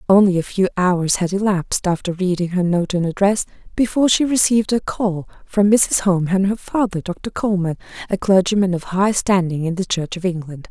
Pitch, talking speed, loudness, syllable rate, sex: 190 Hz, 195 wpm, -18 LUFS, 5.5 syllables/s, female